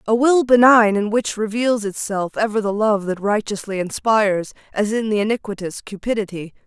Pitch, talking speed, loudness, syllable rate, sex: 210 Hz, 160 wpm, -19 LUFS, 5.1 syllables/s, female